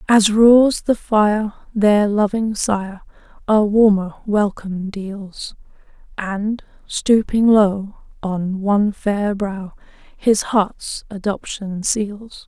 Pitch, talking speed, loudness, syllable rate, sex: 205 Hz, 105 wpm, -18 LUFS, 2.9 syllables/s, female